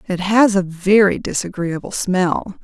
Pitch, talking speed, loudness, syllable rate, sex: 190 Hz, 135 wpm, -17 LUFS, 4.1 syllables/s, female